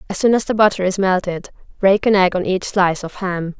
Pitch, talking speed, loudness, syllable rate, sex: 190 Hz, 250 wpm, -17 LUFS, 5.8 syllables/s, female